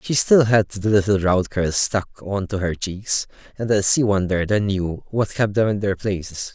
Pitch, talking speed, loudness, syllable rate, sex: 100 Hz, 200 wpm, -20 LUFS, 4.6 syllables/s, male